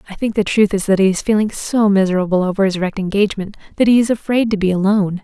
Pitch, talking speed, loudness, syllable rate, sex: 200 Hz, 250 wpm, -16 LUFS, 7.1 syllables/s, female